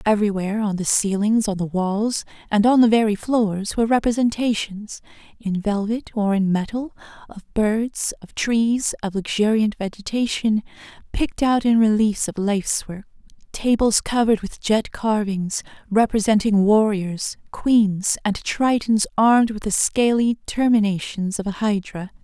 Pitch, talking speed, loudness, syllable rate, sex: 215 Hz, 130 wpm, -20 LUFS, 4.5 syllables/s, female